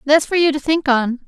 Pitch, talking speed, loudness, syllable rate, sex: 290 Hz, 280 wpm, -16 LUFS, 5.5 syllables/s, female